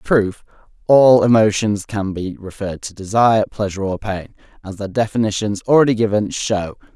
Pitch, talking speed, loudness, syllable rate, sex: 105 Hz, 140 wpm, -17 LUFS, 5.3 syllables/s, male